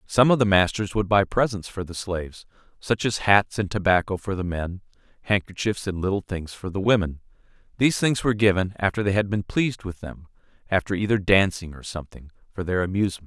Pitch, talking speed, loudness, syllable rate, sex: 100 Hz, 200 wpm, -23 LUFS, 5.9 syllables/s, male